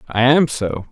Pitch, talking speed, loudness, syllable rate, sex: 125 Hz, 195 wpm, -16 LUFS, 4.0 syllables/s, male